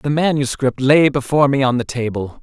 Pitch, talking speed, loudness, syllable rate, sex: 135 Hz, 200 wpm, -16 LUFS, 5.4 syllables/s, male